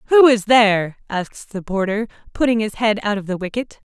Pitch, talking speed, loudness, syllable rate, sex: 215 Hz, 200 wpm, -18 LUFS, 5.3 syllables/s, female